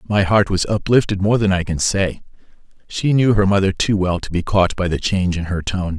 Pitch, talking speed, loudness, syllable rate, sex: 95 Hz, 230 wpm, -18 LUFS, 5.4 syllables/s, male